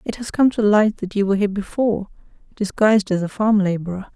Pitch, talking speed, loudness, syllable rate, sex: 205 Hz, 215 wpm, -19 LUFS, 6.5 syllables/s, female